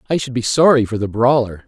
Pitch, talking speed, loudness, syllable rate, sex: 120 Hz, 250 wpm, -16 LUFS, 6.2 syllables/s, male